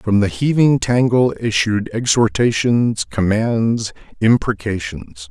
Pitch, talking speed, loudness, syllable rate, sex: 110 Hz, 90 wpm, -17 LUFS, 3.6 syllables/s, male